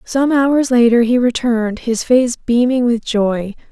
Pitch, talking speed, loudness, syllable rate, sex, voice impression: 240 Hz, 160 wpm, -15 LUFS, 4.1 syllables/s, female, very feminine, slightly young, very thin, relaxed, weak, dark, very soft, very clear, very fluent, very cute, intellectual, very refreshing, sincere, very calm, very friendly, very reassuring, very unique, very elegant, very sweet, very kind, very modest